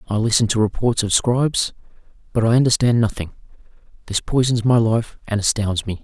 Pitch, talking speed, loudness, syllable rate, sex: 115 Hz, 170 wpm, -19 LUFS, 5.6 syllables/s, male